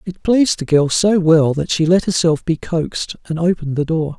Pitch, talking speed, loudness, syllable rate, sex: 165 Hz, 230 wpm, -16 LUFS, 5.5 syllables/s, male